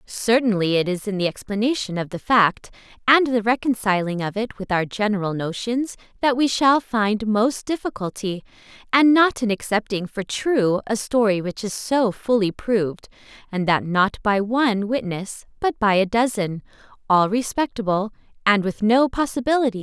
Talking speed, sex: 175 wpm, female